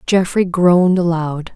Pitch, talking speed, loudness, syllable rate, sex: 175 Hz, 115 wpm, -15 LUFS, 4.2 syllables/s, female